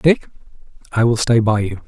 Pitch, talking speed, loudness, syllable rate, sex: 115 Hz, 190 wpm, -17 LUFS, 5.0 syllables/s, male